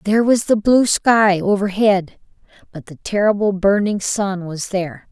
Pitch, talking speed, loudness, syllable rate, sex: 200 Hz, 150 wpm, -17 LUFS, 4.5 syllables/s, female